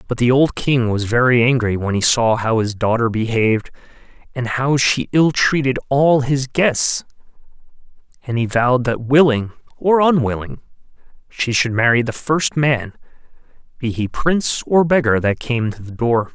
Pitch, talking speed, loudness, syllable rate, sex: 125 Hz, 165 wpm, -17 LUFS, 4.6 syllables/s, male